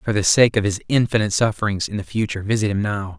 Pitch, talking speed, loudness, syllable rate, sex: 105 Hz, 245 wpm, -20 LUFS, 6.8 syllables/s, male